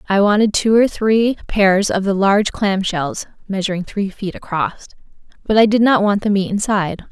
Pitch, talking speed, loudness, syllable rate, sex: 200 Hz, 195 wpm, -16 LUFS, 4.4 syllables/s, female